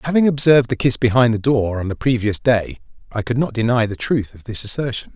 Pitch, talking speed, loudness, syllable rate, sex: 120 Hz, 235 wpm, -18 LUFS, 5.9 syllables/s, male